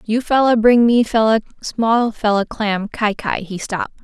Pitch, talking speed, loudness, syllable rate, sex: 220 Hz, 165 wpm, -17 LUFS, 4.1 syllables/s, female